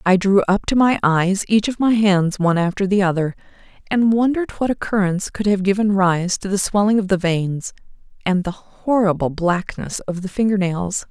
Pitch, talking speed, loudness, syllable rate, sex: 195 Hz, 190 wpm, -18 LUFS, 5.1 syllables/s, female